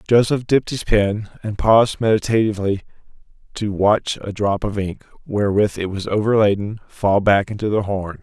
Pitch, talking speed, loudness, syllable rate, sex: 105 Hz, 160 wpm, -19 LUFS, 5.2 syllables/s, male